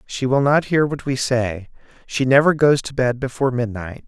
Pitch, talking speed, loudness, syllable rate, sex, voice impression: 130 Hz, 205 wpm, -19 LUFS, 5.0 syllables/s, male, masculine, adult-like, slightly cool, slightly intellectual, slightly refreshing